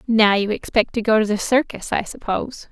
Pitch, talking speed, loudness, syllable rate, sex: 220 Hz, 220 wpm, -20 LUFS, 5.5 syllables/s, female